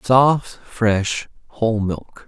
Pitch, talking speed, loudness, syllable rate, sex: 115 Hz, 105 wpm, -20 LUFS, 2.6 syllables/s, male